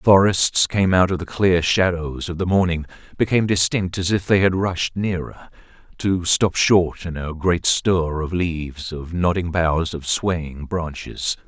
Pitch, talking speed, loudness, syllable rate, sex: 85 Hz, 175 wpm, -20 LUFS, 4.2 syllables/s, male